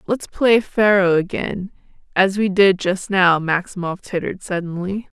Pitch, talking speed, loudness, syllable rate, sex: 190 Hz, 140 wpm, -18 LUFS, 4.4 syllables/s, female